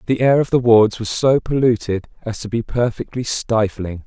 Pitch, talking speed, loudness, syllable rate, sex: 115 Hz, 190 wpm, -18 LUFS, 4.8 syllables/s, male